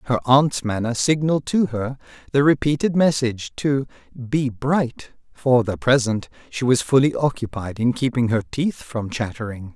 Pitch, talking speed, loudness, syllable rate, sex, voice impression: 125 Hz, 155 wpm, -21 LUFS, 4.6 syllables/s, male, masculine, adult-like, slightly middle-aged, slightly thick, slightly relaxed, slightly weak, bright, slightly soft, slightly clear, fluent, slightly cool, intellectual, refreshing, very sincere, very calm, slightly friendly, reassuring, unique, slightly wild, sweet, slightly lively, kind, slightly modest